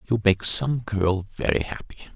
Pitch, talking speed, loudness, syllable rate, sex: 100 Hz, 165 wpm, -23 LUFS, 4.8 syllables/s, male